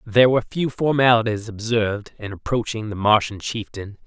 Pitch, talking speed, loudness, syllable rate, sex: 110 Hz, 145 wpm, -20 LUFS, 5.4 syllables/s, male